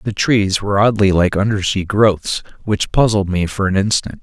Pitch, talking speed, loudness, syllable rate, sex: 100 Hz, 185 wpm, -16 LUFS, 4.9 syllables/s, male